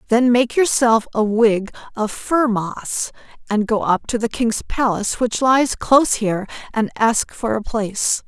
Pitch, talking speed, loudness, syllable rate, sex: 225 Hz, 175 wpm, -18 LUFS, 4.3 syllables/s, female